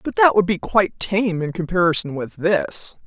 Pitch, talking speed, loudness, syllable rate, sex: 180 Hz, 195 wpm, -19 LUFS, 4.8 syllables/s, female